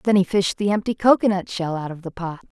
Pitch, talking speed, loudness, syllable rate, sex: 190 Hz, 265 wpm, -21 LUFS, 5.9 syllables/s, female